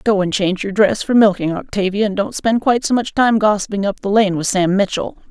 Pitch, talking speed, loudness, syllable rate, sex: 205 Hz, 250 wpm, -16 LUFS, 5.9 syllables/s, female